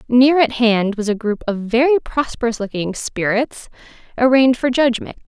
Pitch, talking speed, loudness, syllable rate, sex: 235 Hz, 160 wpm, -17 LUFS, 4.9 syllables/s, female